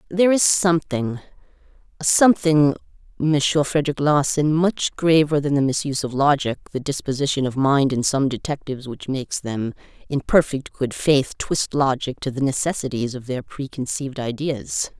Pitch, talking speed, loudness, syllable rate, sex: 140 Hz, 150 wpm, -21 LUFS, 5.2 syllables/s, female